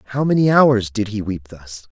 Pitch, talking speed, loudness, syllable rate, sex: 110 Hz, 215 wpm, -17 LUFS, 4.3 syllables/s, male